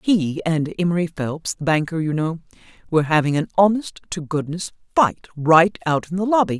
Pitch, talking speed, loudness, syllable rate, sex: 165 Hz, 180 wpm, -20 LUFS, 5.2 syllables/s, female